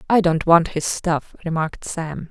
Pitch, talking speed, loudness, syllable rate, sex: 165 Hz, 180 wpm, -20 LUFS, 4.4 syllables/s, female